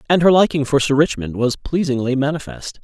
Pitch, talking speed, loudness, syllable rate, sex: 140 Hz, 190 wpm, -17 LUFS, 5.7 syllables/s, male